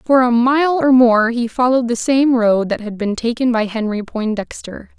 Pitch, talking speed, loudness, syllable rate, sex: 240 Hz, 205 wpm, -16 LUFS, 4.8 syllables/s, female